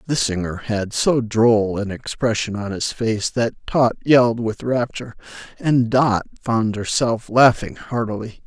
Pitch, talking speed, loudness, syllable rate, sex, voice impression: 115 Hz, 150 wpm, -19 LUFS, 4.1 syllables/s, male, very masculine, very adult-like, middle-aged, thick, slightly tensed, powerful, bright, slightly soft, clear, fluent, cool, very intellectual, slightly refreshing, very sincere, very calm, mature, very friendly, very reassuring, slightly unique, elegant, slightly sweet, slightly lively, kind